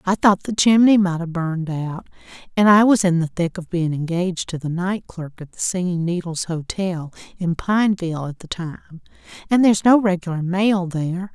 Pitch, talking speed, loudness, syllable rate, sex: 180 Hz, 185 wpm, -20 LUFS, 5.3 syllables/s, female